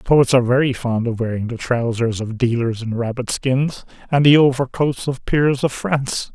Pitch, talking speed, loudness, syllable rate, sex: 125 Hz, 190 wpm, -18 LUFS, 4.8 syllables/s, male